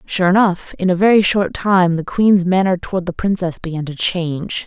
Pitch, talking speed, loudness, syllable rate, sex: 180 Hz, 205 wpm, -16 LUFS, 5.1 syllables/s, female